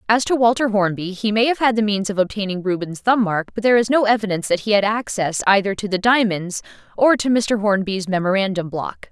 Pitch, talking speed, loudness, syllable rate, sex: 210 Hz, 225 wpm, -19 LUFS, 5.9 syllables/s, female